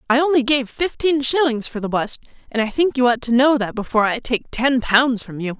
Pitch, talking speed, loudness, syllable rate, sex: 250 Hz, 245 wpm, -19 LUFS, 5.5 syllables/s, female